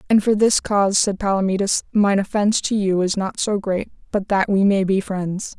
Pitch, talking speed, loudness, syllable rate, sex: 200 Hz, 215 wpm, -19 LUFS, 5.1 syllables/s, female